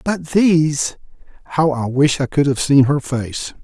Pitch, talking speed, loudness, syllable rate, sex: 145 Hz, 180 wpm, -17 LUFS, 4.2 syllables/s, male